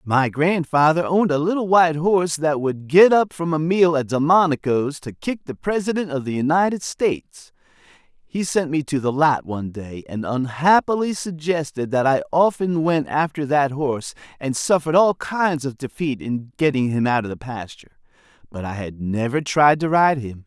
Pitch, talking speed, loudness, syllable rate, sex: 150 Hz, 185 wpm, -20 LUFS, 5.0 syllables/s, male